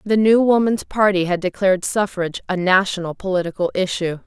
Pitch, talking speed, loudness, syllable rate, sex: 190 Hz, 155 wpm, -19 LUFS, 5.7 syllables/s, female